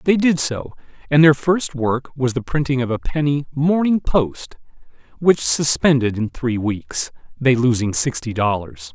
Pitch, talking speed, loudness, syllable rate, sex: 135 Hz, 160 wpm, -19 LUFS, 4.2 syllables/s, male